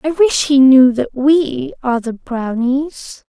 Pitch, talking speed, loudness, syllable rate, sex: 275 Hz, 165 wpm, -14 LUFS, 3.6 syllables/s, female